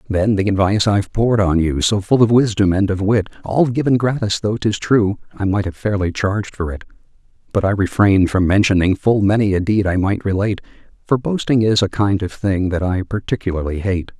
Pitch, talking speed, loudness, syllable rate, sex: 100 Hz, 210 wpm, -17 LUFS, 5.7 syllables/s, male